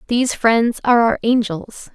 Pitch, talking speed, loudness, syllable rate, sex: 230 Hz, 155 wpm, -16 LUFS, 4.8 syllables/s, female